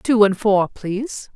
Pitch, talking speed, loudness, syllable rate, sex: 210 Hz, 175 wpm, -18 LUFS, 4.0 syllables/s, female